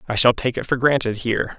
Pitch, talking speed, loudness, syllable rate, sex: 120 Hz, 265 wpm, -20 LUFS, 6.4 syllables/s, male